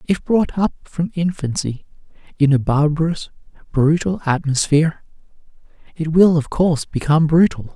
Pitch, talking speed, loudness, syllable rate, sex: 155 Hz, 125 wpm, -18 LUFS, 5.0 syllables/s, male